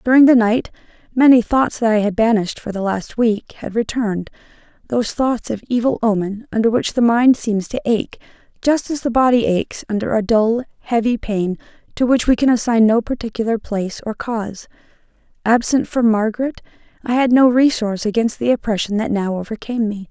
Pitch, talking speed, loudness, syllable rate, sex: 225 Hz, 180 wpm, -17 LUFS, 5.6 syllables/s, female